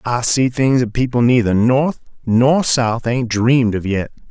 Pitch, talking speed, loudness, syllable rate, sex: 120 Hz, 180 wpm, -16 LUFS, 4.2 syllables/s, male